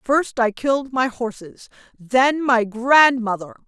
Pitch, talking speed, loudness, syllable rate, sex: 245 Hz, 130 wpm, -18 LUFS, 3.7 syllables/s, female